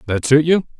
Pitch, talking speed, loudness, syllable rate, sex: 145 Hz, 225 wpm, -15 LUFS, 5.8 syllables/s, male